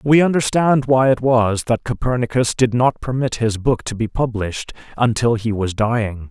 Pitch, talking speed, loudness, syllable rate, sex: 120 Hz, 180 wpm, -18 LUFS, 4.9 syllables/s, male